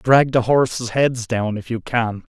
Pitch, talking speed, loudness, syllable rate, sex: 120 Hz, 205 wpm, -19 LUFS, 4.1 syllables/s, male